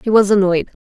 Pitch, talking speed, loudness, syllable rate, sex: 200 Hz, 220 wpm, -14 LUFS, 5.7 syllables/s, female